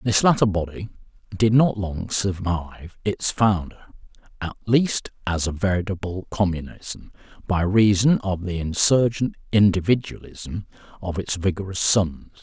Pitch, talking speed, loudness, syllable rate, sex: 95 Hz, 120 wpm, -22 LUFS, 4.4 syllables/s, male